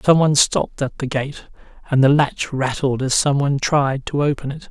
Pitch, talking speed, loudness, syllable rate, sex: 140 Hz, 190 wpm, -18 LUFS, 5.3 syllables/s, male